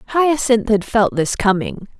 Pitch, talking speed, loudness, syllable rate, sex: 225 Hz, 150 wpm, -17 LUFS, 3.7 syllables/s, female